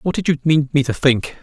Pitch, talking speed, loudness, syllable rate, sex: 150 Hz, 295 wpm, -17 LUFS, 5.6 syllables/s, male